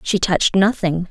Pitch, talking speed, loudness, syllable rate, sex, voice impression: 185 Hz, 165 wpm, -17 LUFS, 5.0 syllables/s, female, feminine, slightly adult-like, slightly clear, slightly cute, slightly refreshing, friendly